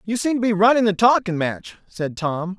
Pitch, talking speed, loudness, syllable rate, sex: 200 Hz, 230 wpm, -19 LUFS, 5.0 syllables/s, male